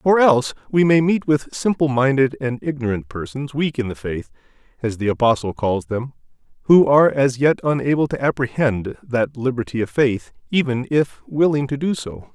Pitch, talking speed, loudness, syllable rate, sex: 135 Hz, 180 wpm, -19 LUFS, 5.1 syllables/s, male